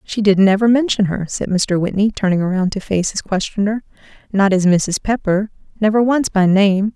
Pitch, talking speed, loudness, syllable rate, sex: 200 Hz, 180 wpm, -16 LUFS, 5.1 syllables/s, female